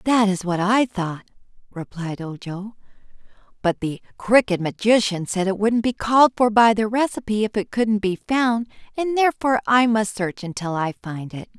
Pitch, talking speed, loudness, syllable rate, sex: 210 Hz, 175 wpm, -21 LUFS, 4.9 syllables/s, female